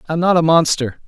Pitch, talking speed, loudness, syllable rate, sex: 160 Hz, 280 wpm, -15 LUFS, 7.0 syllables/s, male